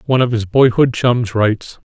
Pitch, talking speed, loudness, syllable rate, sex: 120 Hz, 190 wpm, -15 LUFS, 5.3 syllables/s, male